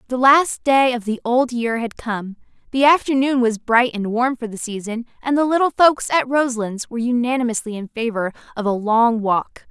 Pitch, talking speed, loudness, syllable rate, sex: 240 Hz, 200 wpm, -19 LUFS, 5.1 syllables/s, female